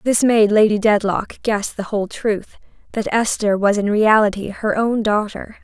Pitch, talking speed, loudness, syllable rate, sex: 210 Hz, 160 wpm, -18 LUFS, 4.7 syllables/s, female